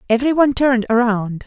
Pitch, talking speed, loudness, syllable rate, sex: 240 Hz, 165 wpm, -16 LUFS, 6.4 syllables/s, female